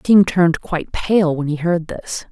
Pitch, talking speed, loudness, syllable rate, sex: 170 Hz, 235 wpm, -18 LUFS, 4.9 syllables/s, female